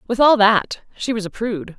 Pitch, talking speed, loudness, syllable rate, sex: 220 Hz, 235 wpm, -18 LUFS, 5.3 syllables/s, female